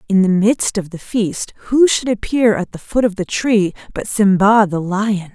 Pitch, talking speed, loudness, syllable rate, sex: 205 Hz, 215 wpm, -16 LUFS, 4.4 syllables/s, female